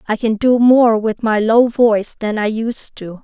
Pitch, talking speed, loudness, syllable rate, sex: 225 Hz, 225 wpm, -14 LUFS, 4.4 syllables/s, female